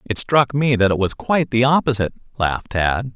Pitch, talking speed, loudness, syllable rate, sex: 120 Hz, 210 wpm, -18 LUFS, 5.7 syllables/s, male